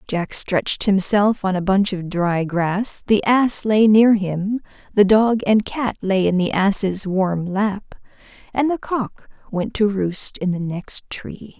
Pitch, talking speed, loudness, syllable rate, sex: 200 Hz, 175 wpm, -19 LUFS, 3.5 syllables/s, female